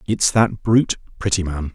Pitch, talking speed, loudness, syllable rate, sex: 95 Hz, 140 wpm, -19 LUFS, 5.0 syllables/s, male